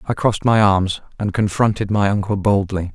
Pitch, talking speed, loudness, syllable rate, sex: 100 Hz, 185 wpm, -18 LUFS, 5.2 syllables/s, male